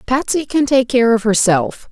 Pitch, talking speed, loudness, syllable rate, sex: 240 Hz, 190 wpm, -15 LUFS, 4.5 syllables/s, female